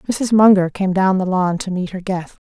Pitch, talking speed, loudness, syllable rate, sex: 190 Hz, 240 wpm, -17 LUFS, 5.1 syllables/s, female